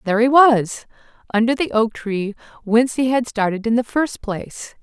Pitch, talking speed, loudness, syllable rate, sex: 230 Hz, 185 wpm, -18 LUFS, 5.1 syllables/s, female